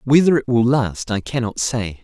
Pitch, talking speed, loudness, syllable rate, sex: 120 Hz, 205 wpm, -18 LUFS, 4.7 syllables/s, male